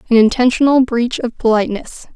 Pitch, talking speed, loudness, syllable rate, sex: 240 Hz, 140 wpm, -14 LUFS, 5.9 syllables/s, female